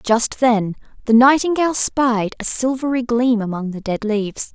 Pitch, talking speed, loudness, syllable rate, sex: 235 Hz, 160 wpm, -17 LUFS, 4.7 syllables/s, female